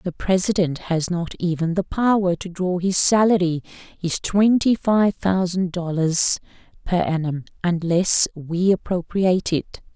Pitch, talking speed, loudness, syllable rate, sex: 180 Hz, 120 wpm, -20 LUFS, 4.0 syllables/s, female